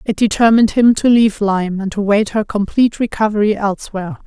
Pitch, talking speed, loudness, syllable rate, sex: 210 Hz, 170 wpm, -15 LUFS, 6.3 syllables/s, female